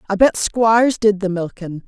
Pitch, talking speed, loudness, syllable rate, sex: 205 Hz, 195 wpm, -16 LUFS, 4.7 syllables/s, female